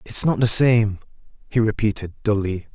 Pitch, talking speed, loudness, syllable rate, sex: 110 Hz, 155 wpm, -20 LUFS, 4.9 syllables/s, male